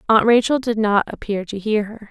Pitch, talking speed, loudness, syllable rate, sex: 215 Hz, 230 wpm, -19 LUFS, 5.4 syllables/s, female